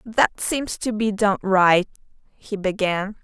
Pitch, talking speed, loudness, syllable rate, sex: 205 Hz, 150 wpm, -21 LUFS, 3.4 syllables/s, female